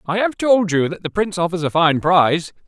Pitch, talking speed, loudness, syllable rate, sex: 175 Hz, 245 wpm, -17 LUFS, 5.7 syllables/s, male